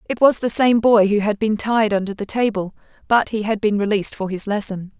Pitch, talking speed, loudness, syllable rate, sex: 210 Hz, 240 wpm, -19 LUFS, 5.5 syllables/s, female